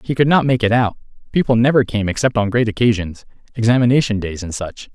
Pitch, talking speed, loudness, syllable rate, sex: 115 Hz, 195 wpm, -17 LUFS, 6.2 syllables/s, male